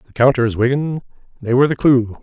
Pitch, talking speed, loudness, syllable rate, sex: 130 Hz, 190 wpm, -16 LUFS, 6.2 syllables/s, male